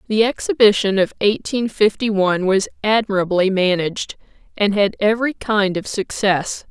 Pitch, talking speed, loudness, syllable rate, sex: 205 Hz, 135 wpm, -18 LUFS, 5.0 syllables/s, female